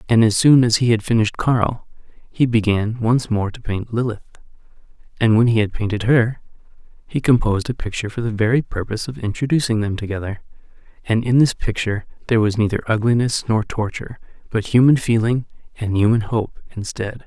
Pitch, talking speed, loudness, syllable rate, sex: 115 Hz, 175 wpm, -19 LUFS, 5.8 syllables/s, male